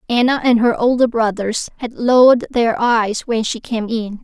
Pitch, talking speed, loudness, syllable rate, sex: 230 Hz, 185 wpm, -16 LUFS, 4.6 syllables/s, female